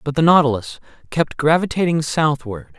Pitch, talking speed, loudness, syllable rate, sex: 140 Hz, 130 wpm, -18 LUFS, 5.0 syllables/s, male